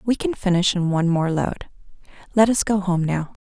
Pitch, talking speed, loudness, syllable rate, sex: 190 Hz, 210 wpm, -20 LUFS, 5.2 syllables/s, female